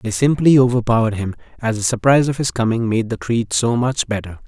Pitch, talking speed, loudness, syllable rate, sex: 115 Hz, 215 wpm, -17 LUFS, 6.0 syllables/s, male